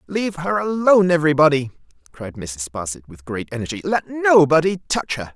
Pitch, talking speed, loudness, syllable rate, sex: 150 Hz, 155 wpm, -19 LUFS, 5.6 syllables/s, male